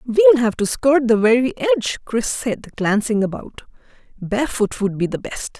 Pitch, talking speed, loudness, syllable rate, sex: 235 Hz, 170 wpm, -18 LUFS, 4.9 syllables/s, female